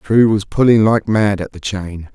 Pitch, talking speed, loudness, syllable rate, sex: 105 Hz, 225 wpm, -15 LUFS, 4.3 syllables/s, male